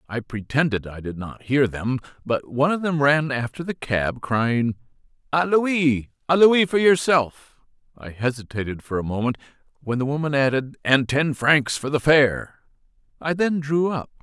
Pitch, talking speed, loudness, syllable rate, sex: 135 Hz, 175 wpm, -22 LUFS, 4.5 syllables/s, male